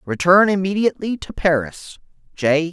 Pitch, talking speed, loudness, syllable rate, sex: 175 Hz, 90 wpm, -18 LUFS, 4.8 syllables/s, male